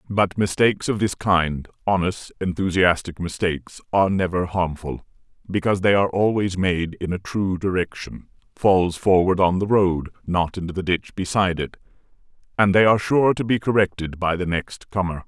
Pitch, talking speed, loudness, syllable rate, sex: 95 Hz, 155 wpm, -21 LUFS, 5.1 syllables/s, male